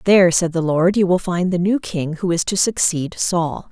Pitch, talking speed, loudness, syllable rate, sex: 175 Hz, 240 wpm, -18 LUFS, 4.8 syllables/s, female